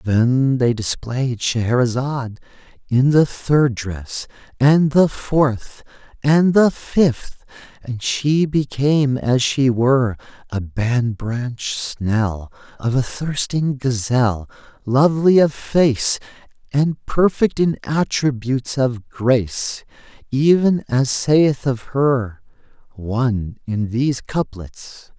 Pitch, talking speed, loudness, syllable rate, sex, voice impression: 130 Hz, 110 wpm, -18 LUFS, 3.2 syllables/s, male, masculine, adult-like, slightly soft, slightly sincere, slightly unique